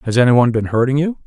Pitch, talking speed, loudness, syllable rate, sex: 130 Hz, 235 wpm, -15 LUFS, 7.3 syllables/s, male